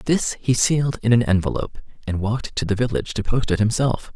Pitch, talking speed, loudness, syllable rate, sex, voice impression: 115 Hz, 215 wpm, -21 LUFS, 6.2 syllables/s, male, masculine, adult-like, slightly thick, slightly intellectual, slightly calm, slightly elegant